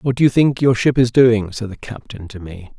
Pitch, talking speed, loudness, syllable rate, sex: 115 Hz, 280 wpm, -15 LUFS, 5.2 syllables/s, male